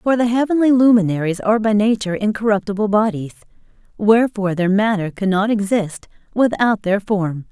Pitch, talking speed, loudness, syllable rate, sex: 210 Hz, 135 wpm, -17 LUFS, 5.7 syllables/s, female